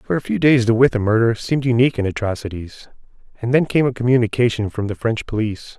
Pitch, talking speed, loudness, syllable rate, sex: 115 Hz, 210 wpm, -18 LUFS, 6.5 syllables/s, male